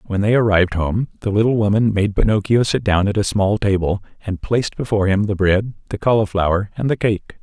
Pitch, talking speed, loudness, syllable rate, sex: 105 Hz, 210 wpm, -18 LUFS, 5.9 syllables/s, male